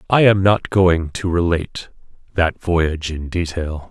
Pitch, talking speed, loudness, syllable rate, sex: 85 Hz, 155 wpm, -18 LUFS, 4.3 syllables/s, male